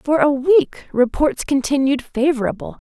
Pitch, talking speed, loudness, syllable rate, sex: 270 Hz, 125 wpm, -18 LUFS, 4.4 syllables/s, female